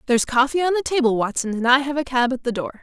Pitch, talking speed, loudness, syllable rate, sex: 260 Hz, 300 wpm, -20 LUFS, 6.8 syllables/s, female